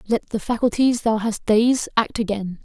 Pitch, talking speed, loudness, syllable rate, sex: 220 Hz, 180 wpm, -20 LUFS, 4.6 syllables/s, female